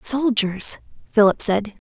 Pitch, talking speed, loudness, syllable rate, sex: 220 Hz, 95 wpm, -19 LUFS, 3.7 syllables/s, female